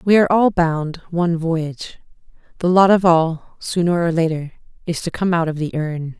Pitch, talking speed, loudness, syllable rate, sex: 170 Hz, 195 wpm, -18 LUFS, 5.3 syllables/s, female